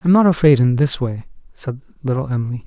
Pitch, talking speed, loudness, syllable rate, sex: 140 Hz, 205 wpm, -17 LUFS, 5.7 syllables/s, male